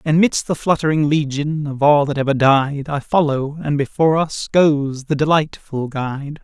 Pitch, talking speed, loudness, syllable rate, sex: 145 Hz, 175 wpm, -18 LUFS, 4.6 syllables/s, male